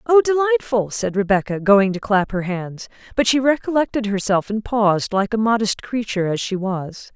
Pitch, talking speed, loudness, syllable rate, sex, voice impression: 215 Hz, 185 wpm, -19 LUFS, 5.0 syllables/s, female, very feminine, slightly adult-like, thin, tensed, powerful, very bright, soft, very clear, very fluent, cute, intellectual, very refreshing, sincere, calm, very friendly, very reassuring, unique, elegant, wild, very sweet, very lively, kind, intense, light